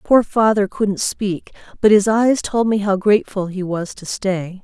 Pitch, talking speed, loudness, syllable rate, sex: 200 Hz, 195 wpm, -18 LUFS, 4.3 syllables/s, female